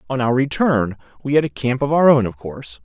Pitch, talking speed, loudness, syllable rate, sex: 130 Hz, 255 wpm, -18 LUFS, 5.8 syllables/s, male